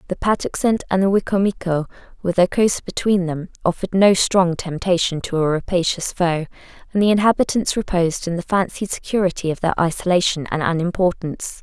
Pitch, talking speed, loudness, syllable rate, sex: 180 Hz, 160 wpm, -19 LUFS, 5.9 syllables/s, female